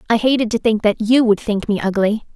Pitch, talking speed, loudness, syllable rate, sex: 220 Hz, 255 wpm, -17 LUFS, 5.9 syllables/s, female